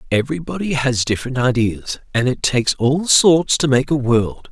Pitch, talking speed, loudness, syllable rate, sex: 135 Hz, 175 wpm, -17 LUFS, 5.1 syllables/s, male